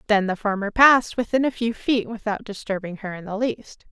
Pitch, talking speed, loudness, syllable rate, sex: 215 Hz, 215 wpm, -22 LUFS, 5.5 syllables/s, female